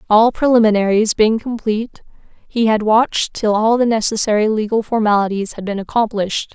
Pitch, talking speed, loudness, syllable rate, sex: 220 Hz, 145 wpm, -16 LUFS, 5.5 syllables/s, female